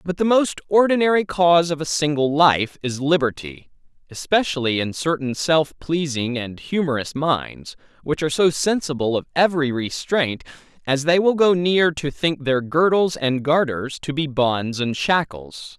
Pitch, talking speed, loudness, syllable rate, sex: 150 Hz, 160 wpm, -20 LUFS, 4.5 syllables/s, male